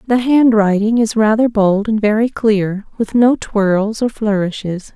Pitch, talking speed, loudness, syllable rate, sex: 215 Hz, 160 wpm, -15 LUFS, 4.1 syllables/s, female